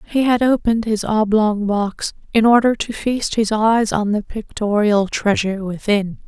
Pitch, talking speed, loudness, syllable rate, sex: 215 Hz, 160 wpm, -18 LUFS, 4.5 syllables/s, female